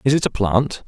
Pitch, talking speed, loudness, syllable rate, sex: 120 Hz, 275 wpm, -19 LUFS, 5.2 syllables/s, male